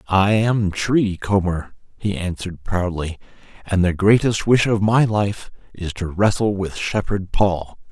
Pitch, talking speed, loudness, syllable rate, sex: 100 Hz, 150 wpm, -20 LUFS, 4.0 syllables/s, male